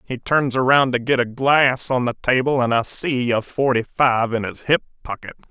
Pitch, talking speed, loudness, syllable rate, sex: 125 Hz, 220 wpm, -19 LUFS, 4.8 syllables/s, male